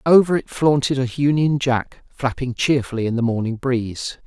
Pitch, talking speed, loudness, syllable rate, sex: 130 Hz, 170 wpm, -20 LUFS, 5.0 syllables/s, male